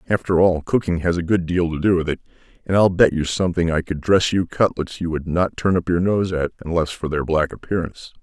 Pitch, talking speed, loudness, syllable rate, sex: 85 Hz, 250 wpm, -20 LUFS, 5.9 syllables/s, male